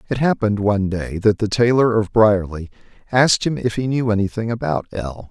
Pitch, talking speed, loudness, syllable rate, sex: 105 Hz, 205 wpm, -18 LUFS, 5.6 syllables/s, male